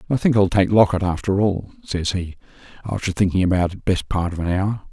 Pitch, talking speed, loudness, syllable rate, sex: 95 Hz, 220 wpm, -20 LUFS, 5.7 syllables/s, male